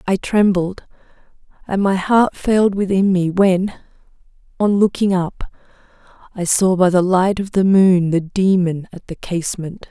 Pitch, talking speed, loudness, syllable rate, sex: 185 Hz, 150 wpm, -16 LUFS, 4.5 syllables/s, female